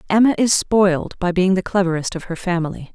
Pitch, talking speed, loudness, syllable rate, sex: 185 Hz, 205 wpm, -18 LUFS, 5.9 syllables/s, female